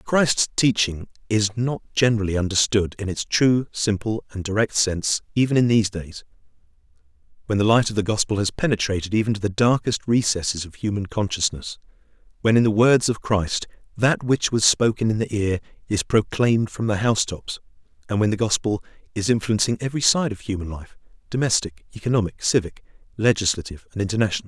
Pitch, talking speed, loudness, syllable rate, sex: 105 Hz, 165 wpm, -21 LUFS, 5.8 syllables/s, male